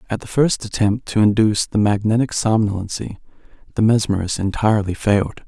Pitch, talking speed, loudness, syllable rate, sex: 105 Hz, 140 wpm, -18 LUFS, 5.8 syllables/s, male